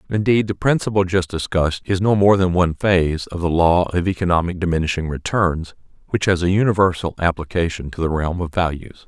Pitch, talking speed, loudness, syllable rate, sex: 90 Hz, 185 wpm, -19 LUFS, 5.8 syllables/s, male